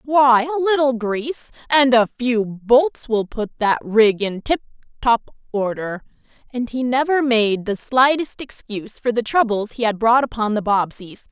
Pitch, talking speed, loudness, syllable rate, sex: 240 Hz, 170 wpm, -19 LUFS, 4.3 syllables/s, female